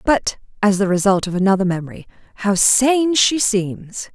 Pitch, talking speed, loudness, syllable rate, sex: 205 Hz, 160 wpm, -17 LUFS, 4.7 syllables/s, female